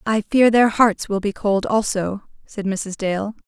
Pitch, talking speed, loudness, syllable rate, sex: 205 Hz, 190 wpm, -19 LUFS, 4.1 syllables/s, female